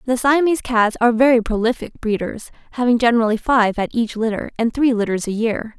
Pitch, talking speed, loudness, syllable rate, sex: 230 Hz, 185 wpm, -18 LUFS, 6.0 syllables/s, female